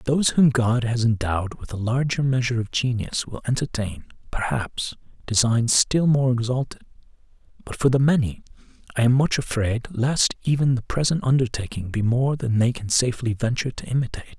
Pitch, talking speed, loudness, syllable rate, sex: 120 Hz, 165 wpm, -22 LUFS, 5.5 syllables/s, male